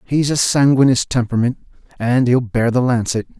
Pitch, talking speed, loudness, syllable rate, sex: 125 Hz, 160 wpm, -16 LUFS, 5.4 syllables/s, male